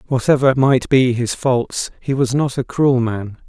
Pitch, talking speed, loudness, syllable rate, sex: 130 Hz, 190 wpm, -17 LUFS, 4.2 syllables/s, male